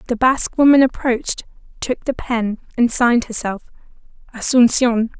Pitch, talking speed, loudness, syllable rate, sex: 240 Hz, 125 wpm, -17 LUFS, 4.8 syllables/s, female